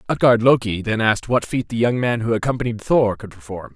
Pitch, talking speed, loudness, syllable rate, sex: 115 Hz, 225 wpm, -19 LUFS, 5.9 syllables/s, male